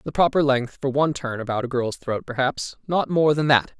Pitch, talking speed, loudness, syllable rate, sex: 135 Hz, 235 wpm, -22 LUFS, 5.4 syllables/s, male